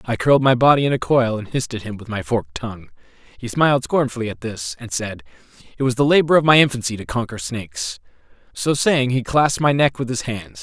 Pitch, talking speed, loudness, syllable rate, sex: 125 Hz, 230 wpm, -19 LUFS, 6.1 syllables/s, male